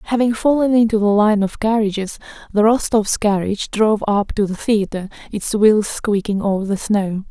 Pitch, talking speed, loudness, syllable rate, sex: 210 Hz, 175 wpm, -17 LUFS, 5.1 syllables/s, female